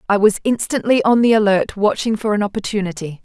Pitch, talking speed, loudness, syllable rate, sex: 210 Hz, 185 wpm, -17 LUFS, 6.0 syllables/s, female